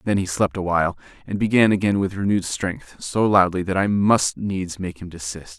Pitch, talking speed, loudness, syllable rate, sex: 95 Hz, 205 wpm, -21 LUFS, 5.2 syllables/s, male